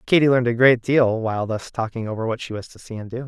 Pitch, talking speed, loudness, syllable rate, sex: 120 Hz, 295 wpm, -20 LUFS, 6.7 syllables/s, male